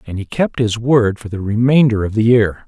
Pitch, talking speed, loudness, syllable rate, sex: 115 Hz, 245 wpm, -15 LUFS, 5.2 syllables/s, male